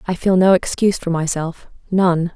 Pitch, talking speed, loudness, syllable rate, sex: 175 Hz, 180 wpm, -17 LUFS, 5.0 syllables/s, female